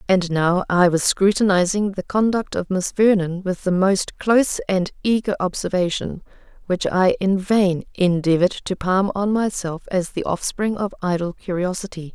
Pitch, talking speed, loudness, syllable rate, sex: 190 Hz, 160 wpm, -20 LUFS, 4.6 syllables/s, female